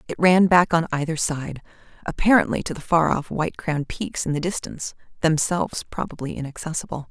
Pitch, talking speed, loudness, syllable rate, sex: 165 Hz, 170 wpm, -22 LUFS, 5.9 syllables/s, female